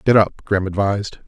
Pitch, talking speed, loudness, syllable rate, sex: 100 Hz, 190 wpm, -19 LUFS, 6.9 syllables/s, male